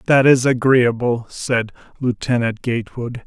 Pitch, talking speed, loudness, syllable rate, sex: 120 Hz, 110 wpm, -18 LUFS, 4.3 syllables/s, male